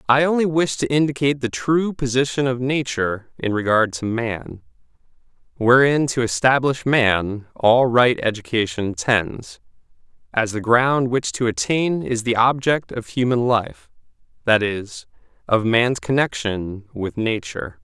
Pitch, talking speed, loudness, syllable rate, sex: 120 Hz, 140 wpm, -20 LUFS, 4.3 syllables/s, male